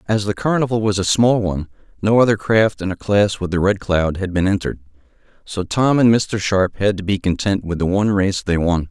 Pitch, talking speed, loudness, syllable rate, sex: 100 Hz, 235 wpm, -18 LUFS, 5.5 syllables/s, male